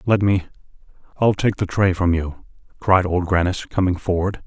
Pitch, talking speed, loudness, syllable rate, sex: 90 Hz, 160 wpm, -20 LUFS, 4.9 syllables/s, male